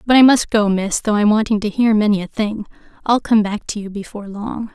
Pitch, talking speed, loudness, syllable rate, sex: 210 Hz, 255 wpm, -17 LUFS, 5.6 syllables/s, female